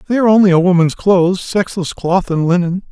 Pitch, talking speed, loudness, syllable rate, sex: 185 Hz, 185 wpm, -13 LUFS, 5.9 syllables/s, male